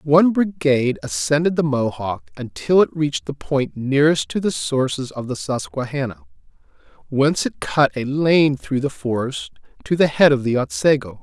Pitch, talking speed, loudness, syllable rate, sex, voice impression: 135 Hz, 165 wpm, -19 LUFS, 5.0 syllables/s, male, masculine, very adult-like, slightly thick, cool, slightly refreshing, sincere, slightly elegant